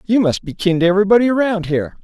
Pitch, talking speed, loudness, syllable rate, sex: 195 Hz, 235 wpm, -16 LUFS, 7.6 syllables/s, male